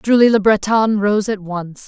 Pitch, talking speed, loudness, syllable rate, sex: 210 Hz, 190 wpm, -16 LUFS, 4.3 syllables/s, female